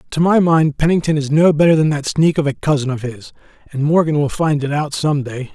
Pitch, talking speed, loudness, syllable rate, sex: 150 Hz, 250 wpm, -16 LUFS, 5.7 syllables/s, male